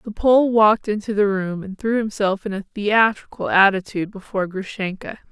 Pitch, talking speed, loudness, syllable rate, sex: 205 Hz, 170 wpm, -20 LUFS, 5.4 syllables/s, female